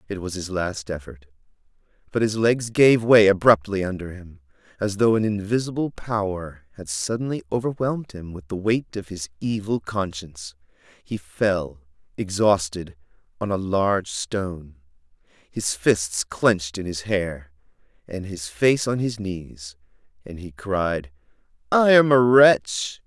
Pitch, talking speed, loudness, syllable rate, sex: 95 Hz, 140 wpm, -22 LUFS, 4.2 syllables/s, male